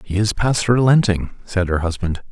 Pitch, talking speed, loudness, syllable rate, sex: 100 Hz, 180 wpm, -18 LUFS, 4.9 syllables/s, male